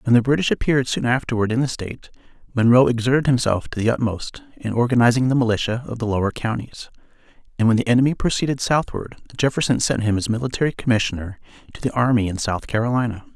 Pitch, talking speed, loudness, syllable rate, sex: 120 Hz, 185 wpm, -20 LUFS, 6.7 syllables/s, male